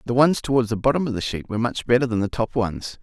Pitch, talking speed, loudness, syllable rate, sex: 120 Hz, 300 wpm, -22 LUFS, 6.6 syllables/s, male